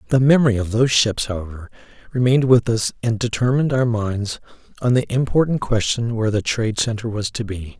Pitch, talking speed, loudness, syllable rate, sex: 115 Hz, 185 wpm, -19 LUFS, 6.1 syllables/s, male